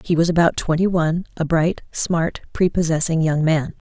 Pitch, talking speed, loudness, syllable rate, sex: 165 Hz, 170 wpm, -19 LUFS, 5.0 syllables/s, female